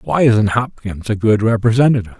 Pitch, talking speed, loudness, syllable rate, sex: 110 Hz, 165 wpm, -15 LUFS, 5.6 syllables/s, male